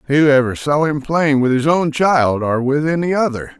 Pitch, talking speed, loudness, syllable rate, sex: 145 Hz, 215 wpm, -16 LUFS, 4.7 syllables/s, male